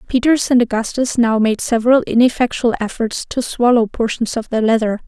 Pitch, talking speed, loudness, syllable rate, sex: 235 Hz, 165 wpm, -16 LUFS, 5.4 syllables/s, female